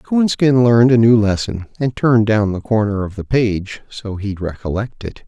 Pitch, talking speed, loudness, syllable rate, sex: 110 Hz, 195 wpm, -16 LUFS, 4.8 syllables/s, male